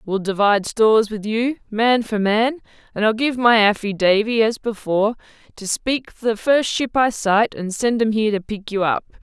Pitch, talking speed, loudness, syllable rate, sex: 220 Hz, 200 wpm, -19 LUFS, 4.8 syllables/s, female